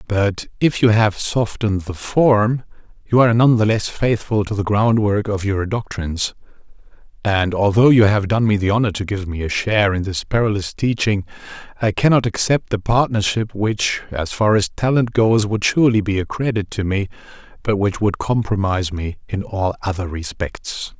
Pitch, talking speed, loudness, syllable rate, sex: 105 Hz, 185 wpm, -18 LUFS, 4.9 syllables/s, male